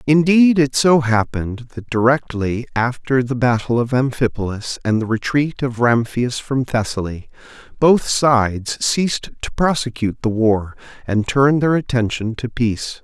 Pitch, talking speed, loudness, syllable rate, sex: 125 Hz, 145 wpm, -18 LUFS, 4.6 syllables/s, male